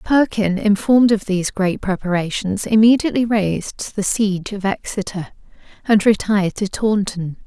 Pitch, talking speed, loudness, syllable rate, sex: 205 Hz, 130 wpm, -18 LUFS, 5.0 syllables/s, female